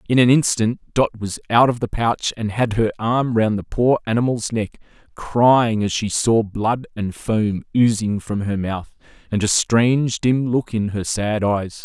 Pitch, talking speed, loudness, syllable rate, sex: 110 Hz, 195 wpm, -19 LUFS, 4.1 syllables/s, male